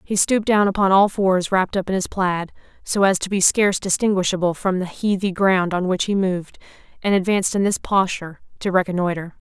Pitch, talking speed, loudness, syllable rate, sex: 190 Hz, 205 wpm, -20 LUFS, 5.8 syllables/s, female